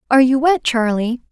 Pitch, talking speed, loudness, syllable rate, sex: 255 Hz, 185 wpm, -16 LUFS, 5.9 syllables/s, female